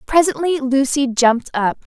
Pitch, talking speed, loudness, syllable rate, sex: 270 Hz, 125 wpm, -17 LUFS, 4.7 syllables/s, female